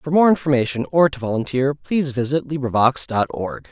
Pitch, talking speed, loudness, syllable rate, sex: 135 Hz, 180 wpm, -19 LUFS, 5.5 syllables/s, male